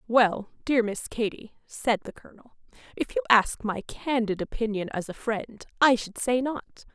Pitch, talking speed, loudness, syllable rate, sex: 230 Hz, 175 wpm, -26 LUFS, 4.7 syllables/s, female